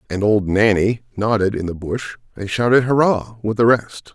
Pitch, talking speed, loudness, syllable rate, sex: 110 Hz, 190 wpm, -18 LUFS, 4.8 syllables/s, male